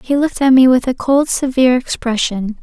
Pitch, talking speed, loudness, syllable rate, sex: 255 Hz, 205 wpm, -14 LUFS, 5.6 syllables/s, female